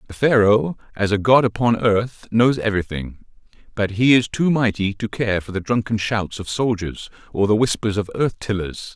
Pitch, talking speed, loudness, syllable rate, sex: 110 Hz, 190 wpm, -20 LUFS, 4.9 syllables/s, male